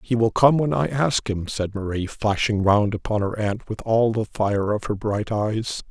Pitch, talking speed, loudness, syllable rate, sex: 110 Hz, 225 wpm, -22 LUFS, 4.4 syllables/s, male